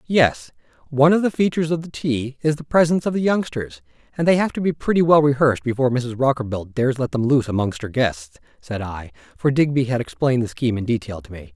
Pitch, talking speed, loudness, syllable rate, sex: 130 Hz, 230 wpm, -20 LUFS, 6.5 syllables/s, male